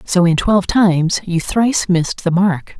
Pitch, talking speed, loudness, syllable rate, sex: 180 Hz, 195 wpm, -15 LUFS, 4.9 syllables/s, female